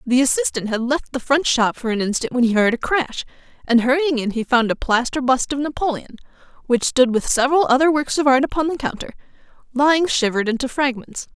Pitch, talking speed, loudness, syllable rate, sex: 260 Hz, 210 wpm, -19 LUFS, 5.9 syllables/s, female